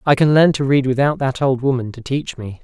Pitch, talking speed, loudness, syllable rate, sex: 135 Hz, 275 wpm, -17 LUFS, 5.6 syllables/s, male